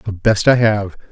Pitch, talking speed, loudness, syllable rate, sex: 105 Hz, 215 wpm, -15 LUFS, 4.7 syllables/s, male